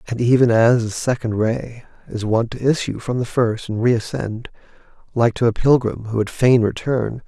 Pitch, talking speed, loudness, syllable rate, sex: 120 Hz, 190 wpm, -19 LUFS, 4.7 syllables/s, male